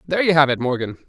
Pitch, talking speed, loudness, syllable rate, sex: 145 Hz, 280 wpm, -18 LUFS, 7.8 syllables/s, male